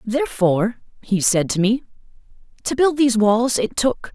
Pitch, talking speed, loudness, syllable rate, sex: 230 Hz, 160 wpm, -19 LUFS, 5.0 syllables/s, female